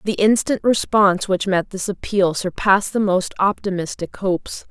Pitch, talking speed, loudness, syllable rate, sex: 195 Hz, 155 wpm, -19 LUFS, 4.9 syllables/s, female